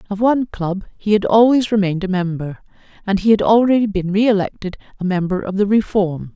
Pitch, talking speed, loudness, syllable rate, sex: 200 Hz, 190 wpm, -17 LUFS, 5.9 syllables/s, female